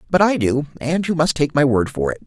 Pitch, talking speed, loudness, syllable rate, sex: 150 Hz, 290 wpm, -18 LUFS, 5.8 syllables/s, male